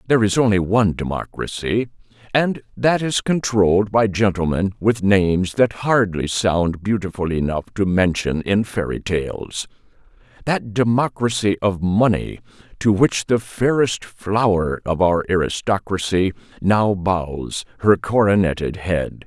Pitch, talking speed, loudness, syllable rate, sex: 100 Hz, 120 wpm, -19 LUFS, 4.2 syllables/s, male